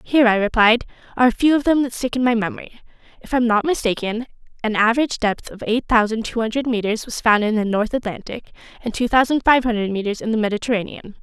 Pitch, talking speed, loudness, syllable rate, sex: 230 Hz, 220 wpm, -19 LUFS, 6.7 syllables/s, female